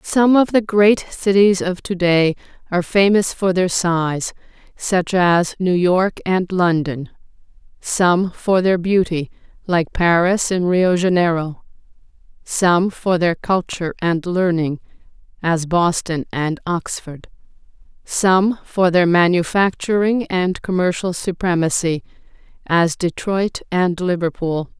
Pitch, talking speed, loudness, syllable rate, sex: 180 Hz, 115 wpm, -18 LUFS, 3.8 syllables/s, female